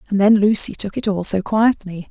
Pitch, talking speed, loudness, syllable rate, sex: 205 Hz, 230 wpm, -17 LUFS, 5.3 syllables/s, female